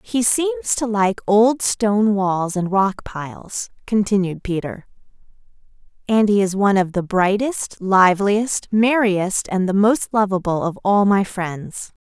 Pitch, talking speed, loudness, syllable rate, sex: 200 Hz, 145 wpm, -18 LUFS, 4.0 syllables/s, female